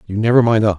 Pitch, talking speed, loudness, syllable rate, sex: 110 Hz, 305 wpm, -14 LUFS, 7.5 syllables/s, male